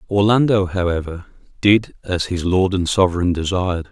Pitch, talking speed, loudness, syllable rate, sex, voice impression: 95 Hz, 140 wpm, -18 LUFS, 5.1 syllables/s, male, masculine, adult-like, thick, cool, slightly intellectual, slightly calm, slightly wild